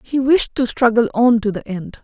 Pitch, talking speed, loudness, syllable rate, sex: 230 Hz, 235 wpm, -16 LUFS, 4.7 syllables/s, female